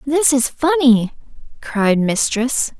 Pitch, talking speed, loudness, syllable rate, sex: 260 Hz, 105 wpm, -16 LUFS, 3.2 syllables/s, female